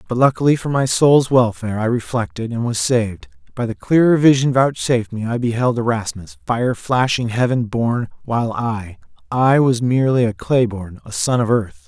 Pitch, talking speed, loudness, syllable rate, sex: 120 Hz, 175 wpm, -18 LUFS, 5.1 syllables/s, male